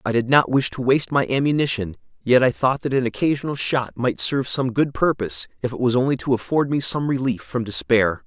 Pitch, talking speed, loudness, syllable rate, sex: 130 Hz, 225 wpm, -21 LUFS, 5.9 syllables/s, male